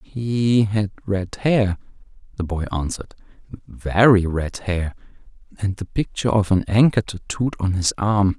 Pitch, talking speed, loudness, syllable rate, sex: 100 Hz, 135 wpm, -21 LUFS, 4.3 syllables/s, male